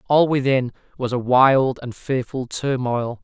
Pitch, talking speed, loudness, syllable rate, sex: 130 Hz, 150 wpm, -20 LUFS, 3.9 syllables/s, male